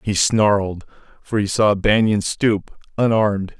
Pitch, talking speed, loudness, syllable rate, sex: 105 Hz, 135 wpm, -18 LUFS, 4.1 syllables/s, male